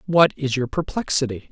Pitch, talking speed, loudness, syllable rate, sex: 140 Hz, 160 wpm, -21 LUFS, 5.2 syllables/s, male